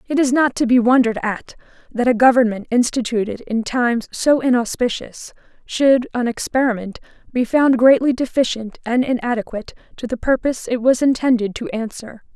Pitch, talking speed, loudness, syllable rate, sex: 240 Hz, 155 wpm, -18 LUFS, 5.4 syllables/s, female